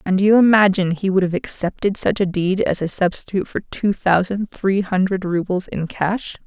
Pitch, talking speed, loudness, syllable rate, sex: 190 Hz, 195 wpm, -19 LUFS, 5.1 syllables/s, female